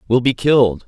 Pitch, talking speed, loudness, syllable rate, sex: 120 Hz, 205 wpm, -15 LUFS, 5.6 syllables/s, male